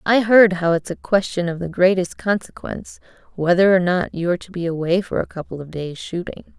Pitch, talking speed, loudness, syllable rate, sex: 180 Hz, 210 wpm, -19 LUFS, 5.5 syllables/s, female